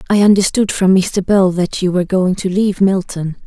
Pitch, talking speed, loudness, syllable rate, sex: 190 Hz, 210 wpm, -14 LUFS, 5.3 syllables/s, female